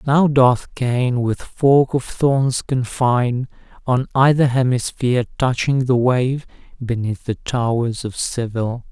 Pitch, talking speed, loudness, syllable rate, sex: 125 Hz, 130 wpm, -18 LUFS, 3.8 syllables/s, male